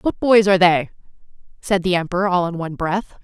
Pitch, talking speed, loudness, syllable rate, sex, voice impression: 185 Hz, 205 wpm, -18 LUFS, 6.1 syllables/s, female, very feminine, slightly adult-like, slightly middle-aged, thin, slightly tensed, slightly powerful, bright, slightly soft, clear, fluent, slightly cute, slightly cool, very intellectual, refreshing, very sincere, very calm, friendly, reassuring, slightly unique, very elegant, slightly sweet, slightly lively, kind